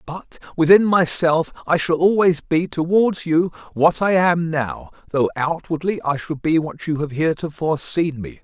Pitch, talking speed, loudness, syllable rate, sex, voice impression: 160 Hz, 170 wpm, -19 LUFS, 4.6 syllables/s, male, masculine, middle-aged, tensed, powerful, clear, intellectual, calm, mature, friendly, wild, strict